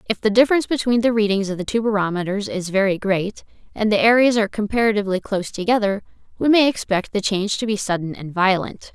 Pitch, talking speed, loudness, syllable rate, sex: 210 Hz, 200 wpm, -19 LUFS, 6.5 syllables/s, female